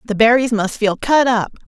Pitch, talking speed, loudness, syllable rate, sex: 230 Hz, 205 wpm, -15 LUFS, 5.0 syllables/s, female